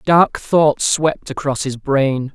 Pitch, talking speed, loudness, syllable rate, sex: 140 Hz, 155 wpm, -17 LUFS, 3.1 syllables/s, male